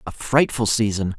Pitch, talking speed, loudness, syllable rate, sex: 115 Hz, 150 wpm, -20 LUFS, 4.7 syllables/s, male